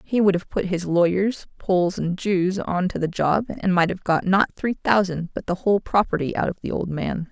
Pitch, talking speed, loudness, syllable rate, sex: 185 Hz, 240 wpm, -22 LUFS, 5.1 syllables/s, female